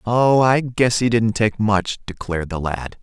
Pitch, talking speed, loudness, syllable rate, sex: 110 Hz, 200 wpm, -19 LUFS, 4.1 syllables/s, male